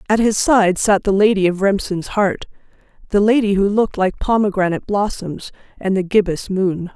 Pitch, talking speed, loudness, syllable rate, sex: 200 Hz, 165 wpm, -17 LUFS, 5.2 syllables/s, female